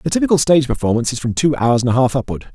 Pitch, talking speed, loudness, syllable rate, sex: 135 Hz, 285 wpm, -16 LUFS, 7.7 syllables/s, male